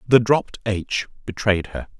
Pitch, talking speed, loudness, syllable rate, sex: 105 Hz, 150 wpm, -21 LUFS, 4.4 syllables/s, male